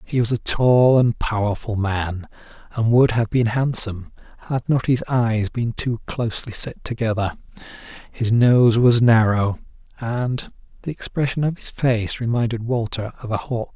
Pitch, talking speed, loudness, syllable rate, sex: 115 Hz, 155 wpm, -20 LUFS, 4.5 syllables/s, male